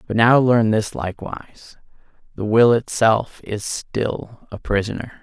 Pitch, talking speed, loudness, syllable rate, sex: 110 Hz, 140 wpm, -19 LUFS, 4.1 syllables/s, male